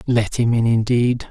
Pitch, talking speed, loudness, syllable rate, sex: 115 Hz, 185 wpm, -18 LUFS, 4.4 syllables/s, male